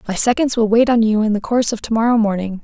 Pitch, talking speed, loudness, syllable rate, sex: 225 Hz, 295 wpm, -16 LUFS, 6.9 syllables/s, female